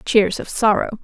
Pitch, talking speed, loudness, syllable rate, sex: 215 Hz, 175 wpm, -18 LUFS, 4.3 syllables/s, female